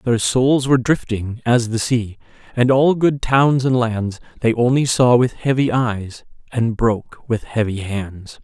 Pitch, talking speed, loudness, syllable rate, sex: 120 Hz, 170 wpm, -18 LUFS, 4.1 syllables/s, male